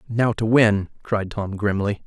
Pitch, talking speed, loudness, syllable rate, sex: 105 Hz, 175 wpm, -21 LUFS, 4.0 syllables/s, male